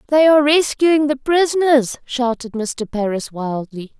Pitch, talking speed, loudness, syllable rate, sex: 265 Hz, 135 wpm, -17 LUFS, 4.3 syllables/s, female